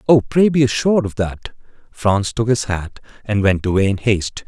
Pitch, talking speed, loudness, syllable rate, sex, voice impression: 110 Hz, 200 wpm, -17 LUFS, 5.2 syllables/s, male, very masculine, very adult-like, middle-aged, very thick, slightly relaxed, slightly powerful, slightly dark, soft, slightly muffled, fluent, slightly raspy, very cool, intellectual, sincere, very calm, very mature, friendly, reassuring, wild, very kind, slightly modest